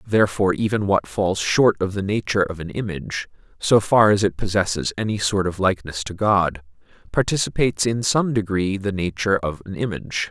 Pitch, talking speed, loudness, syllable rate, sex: 100 Hz, 180 wpm, -21 LUFS, 5.7 syllables/s, male